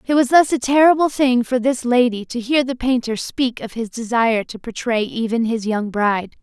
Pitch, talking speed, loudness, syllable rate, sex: 240 Hz, 215 wpm, -18 LUFS, 5.1 syllables/s, female